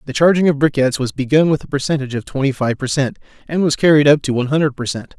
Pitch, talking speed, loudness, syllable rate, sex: 140 Hz, 265 wpm, -16 LUFS, 7.2 syllables/s, male